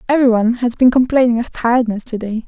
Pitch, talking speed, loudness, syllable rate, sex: 240 Hz, 220 wpm, -15 LUFS, 7.0 syllables/s, female